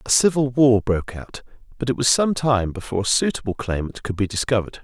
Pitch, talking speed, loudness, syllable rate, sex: 120 Hz, 210 wpm, -20 LUFS, 6.2 syllables/s, male